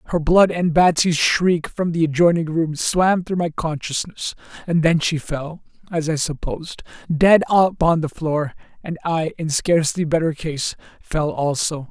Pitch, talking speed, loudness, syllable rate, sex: 160 Hz, 160 wpm, -19 LUFS, 4.4 syllables/s, male